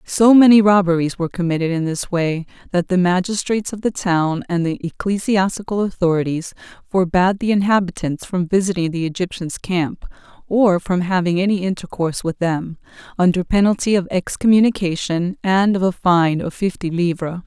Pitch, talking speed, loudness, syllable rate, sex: 185 Hz, 150 wpm, -18 LUFS, 5.3 syllables/s, female